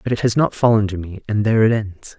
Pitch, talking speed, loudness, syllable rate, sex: 110 Hz, 300 wpm, -18 LUFS, 6.2 syllables/s, male